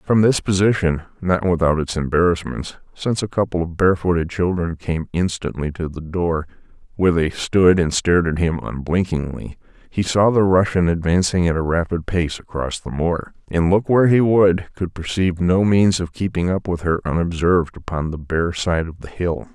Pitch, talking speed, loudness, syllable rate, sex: 85 Hz, 180 wpm, -19 LUFS, 5.2 syllables/s, male